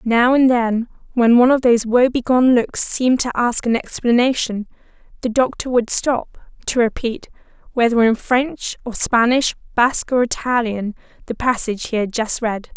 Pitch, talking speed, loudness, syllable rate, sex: 240 Hz, 150 wpm, -17 LUFS, 4.8 syllables/s, female